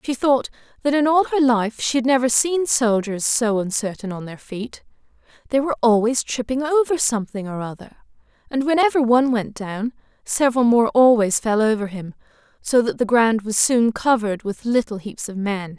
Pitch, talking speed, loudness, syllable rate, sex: 235 Hz, 180 wpm, -19 LUFS, 5.3 syllables/s, female